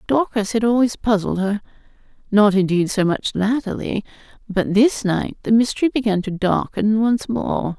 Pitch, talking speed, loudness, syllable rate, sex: 215 Hz, 140 wpm, -19 LUFS, 4.7 syllables/s, female